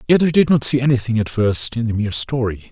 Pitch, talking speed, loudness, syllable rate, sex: 120 Hz, 265 wpm, -17 LUFS, 6.3 syllables/s, male